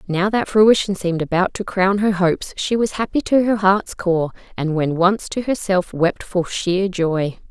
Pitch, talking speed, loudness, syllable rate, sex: 190 Hz, 200 wpm, -19 LUFS, 4.4 syllables/s, female